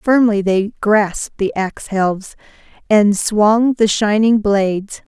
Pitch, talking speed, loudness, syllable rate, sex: 210 Hz, 130 wpm, -15 LUFS, 3.9 syllables/s, female